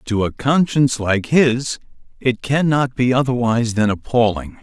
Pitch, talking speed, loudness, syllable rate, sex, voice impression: 125 Hz, 145 wpm, -18 LUFS, 4.6 syllables/s, male, masculine, very adult-like, slightly thick, sincere, slightly friendly, slightly kind